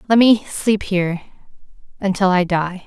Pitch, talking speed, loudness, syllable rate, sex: 190 Hz, 125 wpm, -17 LUFS, 4.7 syllables/s, female